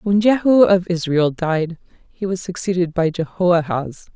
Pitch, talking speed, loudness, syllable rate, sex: 175 Hz, 145 wpm, -18 LUFS, 4.2 syllables/s, female